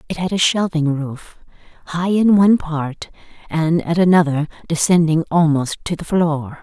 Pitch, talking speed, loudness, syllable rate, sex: 165 Hz, 155 wpm, -17 LUFS, 4.6 syllables/s, female